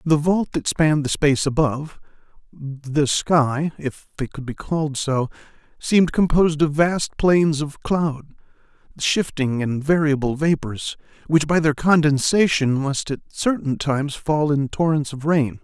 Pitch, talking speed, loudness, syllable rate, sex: 150 Hz, 150 wpm, -20 LUFS, 4.3 syllables/s, male